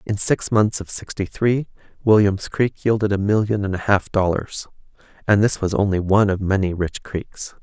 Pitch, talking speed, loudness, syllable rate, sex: 100 Hz, 190 wpm, -20 LUFS, 4.9 syllables/s, male